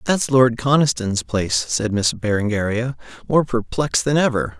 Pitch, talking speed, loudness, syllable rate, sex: 120 Hz, 145 wpm, -19 LUFS, 4.9 syllables/s, male